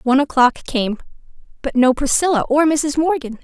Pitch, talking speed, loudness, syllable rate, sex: 275 Hz, 155 wpm, -17 LUFS, 5.4 syllables/s, female